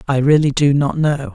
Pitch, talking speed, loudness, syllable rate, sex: 145 Hz, 225 wpm, -15 LUFS, 5.0 syllables/s, male